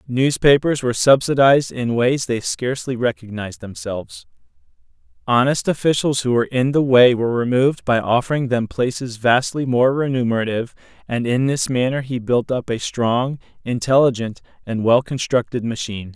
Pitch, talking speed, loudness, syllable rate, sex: 125 Hz, 145 wpm, -19 LUFS, 5.3 syllables/s, male